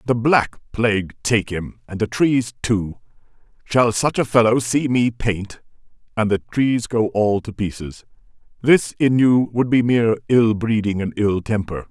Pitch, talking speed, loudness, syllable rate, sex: 110 Hz, 165 wpm, -19 LUFS, 4.2 syllables/s, male